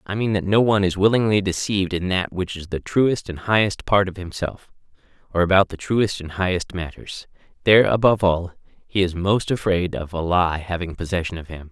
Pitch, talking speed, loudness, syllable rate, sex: 95 Hz, 205 wpm, -21 LUFS, 5.5 syllables/s, male